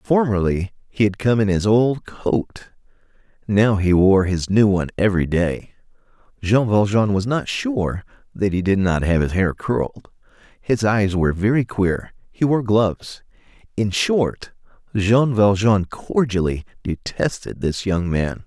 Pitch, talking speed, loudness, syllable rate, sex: 105 Hz, 150 wpm, -19 LUFS, 4.2 syllables/s, male